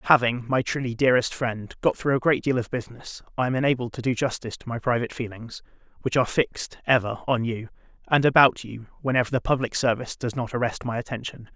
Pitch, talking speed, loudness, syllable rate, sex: 120 Hz, 210 wpm, -24 LUFS, 6.4 syllables/s, male